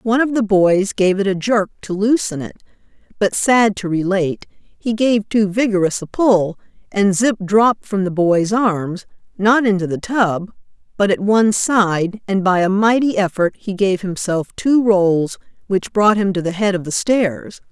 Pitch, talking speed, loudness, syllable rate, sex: 200 Hz, 185 wpm, -17 LUFS, 4.4 syllables/s, female